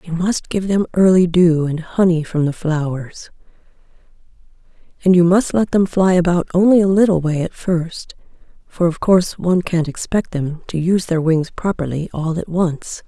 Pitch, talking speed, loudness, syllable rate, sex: 170 Hz, 180 wpm, -17 LUFS, 4.9 syllables/s, female